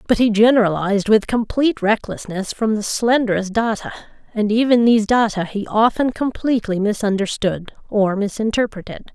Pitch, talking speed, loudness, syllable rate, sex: 215 Hz, 130 wpm, -18 LUFS, 5.4 syllables/s, female